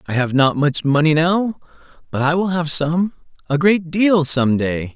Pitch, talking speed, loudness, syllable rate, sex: 160 Hz, 180 wpm, -17 LUFS, 4.4 syllables/s, male